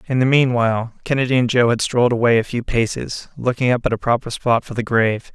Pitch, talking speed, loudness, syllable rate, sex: 120 Hz, 235 wpm, -18 LUFS, 6.1 syllables/s, male